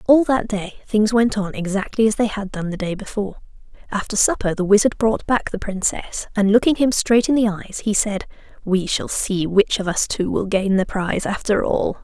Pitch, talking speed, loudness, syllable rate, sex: 210 Hz, 220 wpm, -20 LUFS, 5.1 syllables/s, female